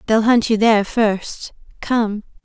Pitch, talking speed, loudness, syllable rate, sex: 220 Hz, 150 wpm, -17 LUFS, 3.8 syllables/s, female